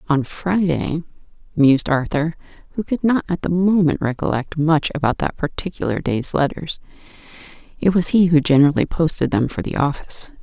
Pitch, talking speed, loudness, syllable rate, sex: 160 Hz, 155 wpm, -19 LUFS, 5.4 syllables/s, female